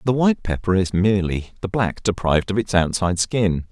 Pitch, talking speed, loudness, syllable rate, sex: 100 Hz, 195 wpm, -20 LUFS, 5.8 syllables/s, male